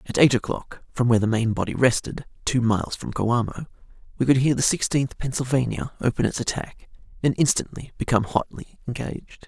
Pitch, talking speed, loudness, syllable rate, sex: 125 Hz, 170 wpm, -23 LUFS, 5.9 syllables/s, male